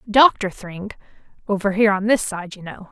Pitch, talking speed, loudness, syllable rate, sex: 200 Hz, 165 wpm, -19 LUFS, 5.4 syllables/s, female